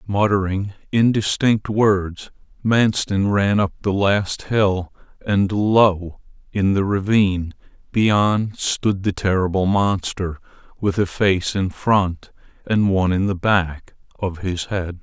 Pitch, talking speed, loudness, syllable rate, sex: 100 Hz, 130 wpm, -19 LUFS, 3.5 syllables/s, male